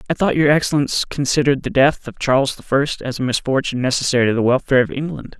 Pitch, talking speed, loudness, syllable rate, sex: 140 Hz, 225 wpm, -18 LUFS, 6.9 syllables/s, male